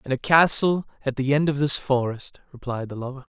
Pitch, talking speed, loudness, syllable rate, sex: 135 Hz, 215 wpm, -22 LUFS, 5.5 syllables/s, male